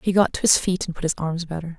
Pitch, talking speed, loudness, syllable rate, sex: 170 Hz, 370 wpm, -22 LUFS, 7.2 syllables/s, female